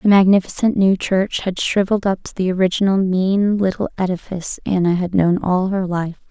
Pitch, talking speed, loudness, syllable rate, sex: 190 Hz, 180 wpm, -18 LUFS, 5.3 syllables/s, female